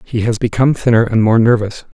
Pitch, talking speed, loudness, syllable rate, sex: 115 Hz, 210 wpm, -13 LUFS, 6.2 syllables/s, male